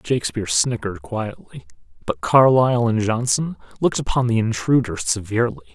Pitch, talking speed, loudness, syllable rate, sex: 110 Hz, 125 wpm, -20 LUFS, 5.8 syllables/s, male